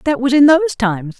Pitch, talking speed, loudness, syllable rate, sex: 260 Hz, 250 wpm, -13 LUFS, 7.7 syllables/s, female